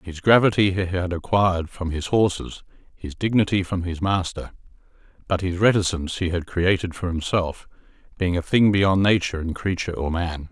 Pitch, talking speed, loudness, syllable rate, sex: 90 Hz, 170 wpm, -22 LUFS, 5.3 syllables/s, male